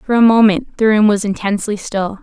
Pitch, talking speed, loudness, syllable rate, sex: 210 Hz, 215 wpm, -14 LUFS, 5.5 syllables/s, female